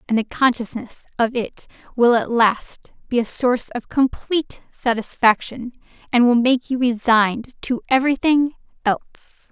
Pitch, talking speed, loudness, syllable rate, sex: 240 Hz, 140 wpm, -19 LUFS, 4.5 syllables/s, female